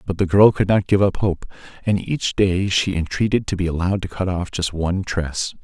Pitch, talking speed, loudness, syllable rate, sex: 95 Hz, 235 wpm, -20 LUFS, 5.3 syllables/s, male